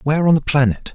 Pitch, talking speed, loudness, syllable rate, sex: 145 Hz, 255 wpm, -16 LUFS, 7.1 syllables/s, male